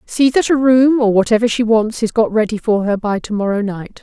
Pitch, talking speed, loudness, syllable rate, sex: 225 Hz, 255 wpm, -15 LUFS, 5.3 syllables/s, female